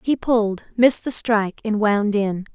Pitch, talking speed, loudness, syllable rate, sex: 215 Hz, 190 wpm, -20 LUFS, 4.9 syllables/s, female